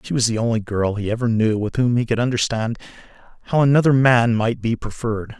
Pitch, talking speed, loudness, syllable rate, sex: 115 Hz, 210 wpm, -19 LUFS, 6.0 syllables/s, male